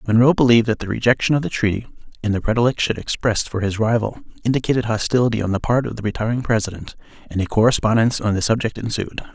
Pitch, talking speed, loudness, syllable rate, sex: 115 Hz, 200 wpm, -19 LUFS, 7.1 syllables/s, male